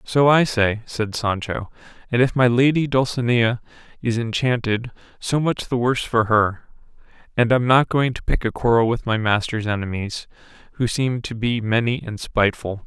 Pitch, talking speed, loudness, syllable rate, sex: 120 Hz, 175 wpm, -20 LUFS, 4.9 syllables/s, male